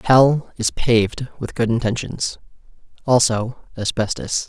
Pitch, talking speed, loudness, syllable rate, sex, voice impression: 120 Hz, 95 wpm, -20 LUFS, 4.2 syllables/s, male, masculine, adult-like, tensed, slightly powerful, bright, clear, cool, intellectual, slightly calm, friendly, lively, kind, slightly modest